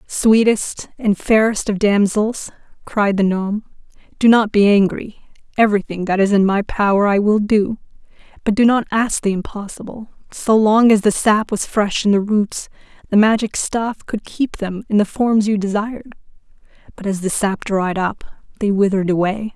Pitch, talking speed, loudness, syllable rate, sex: 210 Hz, 170 wpm, -17 LUFS, 4.8 syllables/s, female